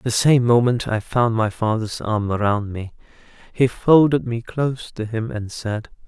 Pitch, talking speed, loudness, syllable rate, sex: 115 Hz, 180 wpm, -20 LUFS, 4.3 syllables/s, male